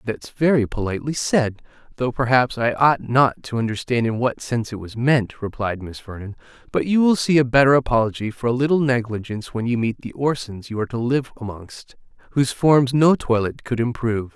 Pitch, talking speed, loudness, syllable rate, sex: 120 Hz, 190 wpm, -20 LUFS, 5.6 syllables/s, male